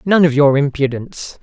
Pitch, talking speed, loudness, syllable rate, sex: 145 Hz, 170 wpm, -14 LUFS, 5.3 syllables/s, male